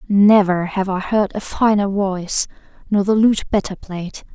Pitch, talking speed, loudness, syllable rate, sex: 200 Hz, 165 wpm, -18 LUFS, 4.4 syllables/s, female